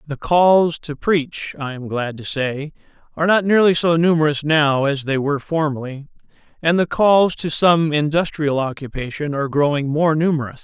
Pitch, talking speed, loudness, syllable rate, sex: 150 Hz, 170 wpm, -18 LUFS, 4.9 syllables/s, male